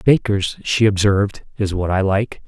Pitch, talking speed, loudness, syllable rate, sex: 100 Hz, 170 wpm, -18 LUFS, 4.6 syllables/s, male